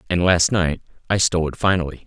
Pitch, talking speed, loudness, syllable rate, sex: 85 Hz, 205 wpm, -19 LUFS, 6.3 syllables/s, male